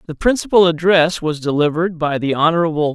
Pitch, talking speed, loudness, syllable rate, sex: 165 Hz, 165 wpm, -16 LUFS, 6.1 syllables/s, male